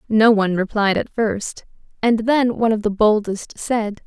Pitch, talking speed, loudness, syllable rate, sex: 215 Hz, 175 wpm, -19 LUFS, 4.6 syllables/s, female